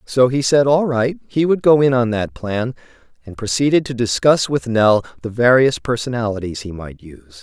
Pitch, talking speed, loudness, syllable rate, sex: 120 Hz, 195 wpm, -17 LUFS, 5.1 syllables/s, male